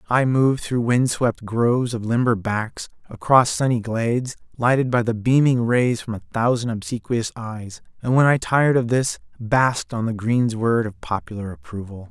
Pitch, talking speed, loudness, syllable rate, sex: 115 Hz, 175 wpm, -21 LUFS, 4.8 syllables/s, male